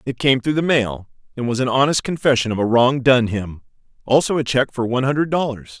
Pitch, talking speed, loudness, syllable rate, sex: 130 Hz, 230 wpm, -18 LUFS, 5.8 syllables/s, male